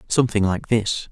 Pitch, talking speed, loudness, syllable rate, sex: 110 Hz, 160 wpm, -21 LUFS, 5.3 syllables/s, male